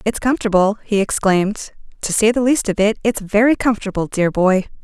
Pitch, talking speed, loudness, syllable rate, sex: 210 Hz, 185 wpm, -17 LUFS, 5.7 syllables/s, female